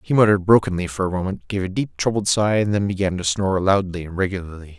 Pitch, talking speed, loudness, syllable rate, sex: 95 Hz, 240 wpm, -20 LUFS, 6.6 syllables/s, male